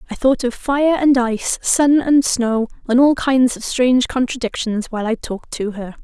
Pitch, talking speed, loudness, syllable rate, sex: 250 Hz, 200 wpm, -17 LUFS, 4.9 syllables/s, female